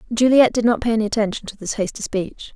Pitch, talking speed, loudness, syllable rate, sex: 220 Hz, 210 wpm, -19 LUFS, 5.6 syllables/s, female